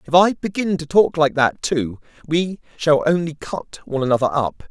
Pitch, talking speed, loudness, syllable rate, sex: 155 Hz, 190 wpm, -19 LUFS, 4.9 syllables/s, male